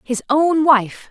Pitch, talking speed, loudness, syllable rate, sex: 275 Hz, 165 wpm, -16 LUFS, 3.2 syllables/s, female